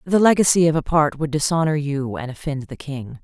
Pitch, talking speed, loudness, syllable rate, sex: 150 Hz, 225 wpm, -20 LUFS, 5.5 syllables/s, female